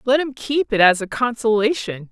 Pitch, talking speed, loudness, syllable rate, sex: 235 Hz, 200 wpm, -18 LUFS, 5.0 syllables/s, female